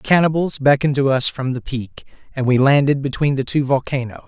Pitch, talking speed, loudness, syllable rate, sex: 135 Hz, 210 wpm, -18 LUFS, 5.9 syllables/s, male